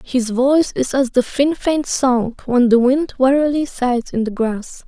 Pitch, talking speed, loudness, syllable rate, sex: 260 Hz, 195 wpm, -17 LUFS, 4.3 syllables/s, female